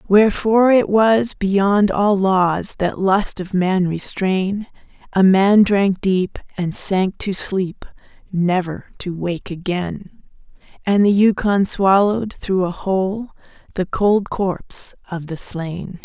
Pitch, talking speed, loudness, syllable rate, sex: 190 Hz, 135 wpm, -18 LUFS, 3.4 syllables/s, female